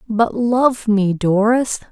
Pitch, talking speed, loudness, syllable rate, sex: 220 Hz, 125 wpm, -16 LUFS, 3.0 syllables/s, female